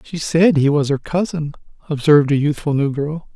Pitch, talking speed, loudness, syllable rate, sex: 150 Hz, 195 wpm, -17 LUFS, 5.2 syllables/s, male